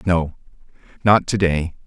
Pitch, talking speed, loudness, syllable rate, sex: 90 Hz, 130 wpm, -19 LUFS, 4.0 syllables/s, male